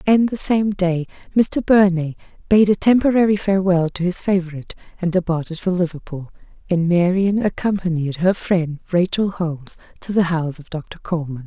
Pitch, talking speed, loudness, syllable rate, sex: 180 Hz, 155 wpm, -19 LUFS, 5.3 syllables/s, female